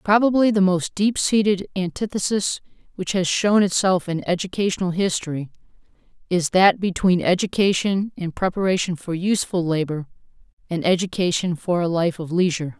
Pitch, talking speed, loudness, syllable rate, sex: 185 Hz, 135 wpm, -21 LUFS, 5.3 syllables/s, female